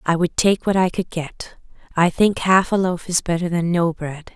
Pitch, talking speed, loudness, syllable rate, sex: 175 Hz, 235 wpm, -19 LUFS, 4.7 syllables/s, female